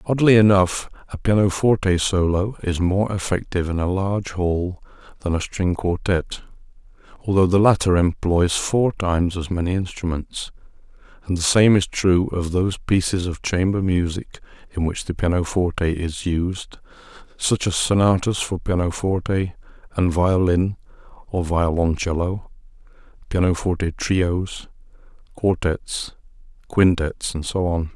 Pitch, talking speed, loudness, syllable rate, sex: 90 Hz, 125 wpm, -21 LUFS, 4.5 syllables/s, male